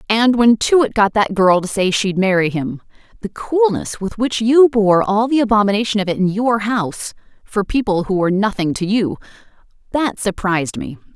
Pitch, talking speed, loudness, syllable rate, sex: 210 Hz, 175 wpm, -16 LUFS, 5.2 syllables/s, female